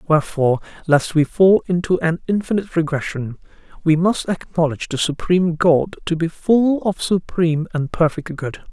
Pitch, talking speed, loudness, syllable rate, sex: 170 Hz, 150 wpm, -19 LUFS, 5.2 syllables/s, male